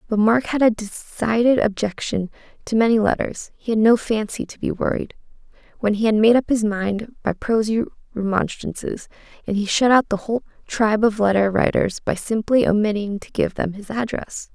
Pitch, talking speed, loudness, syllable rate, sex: 215 Hz, 180 wpm, -20 LUFS, 5.1 syllables/s, female